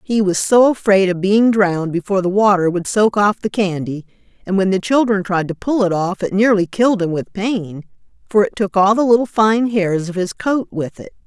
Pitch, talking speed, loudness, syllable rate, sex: 200 Hz, 230 wpm, -16 LUFS, 5.2 syllables/s, female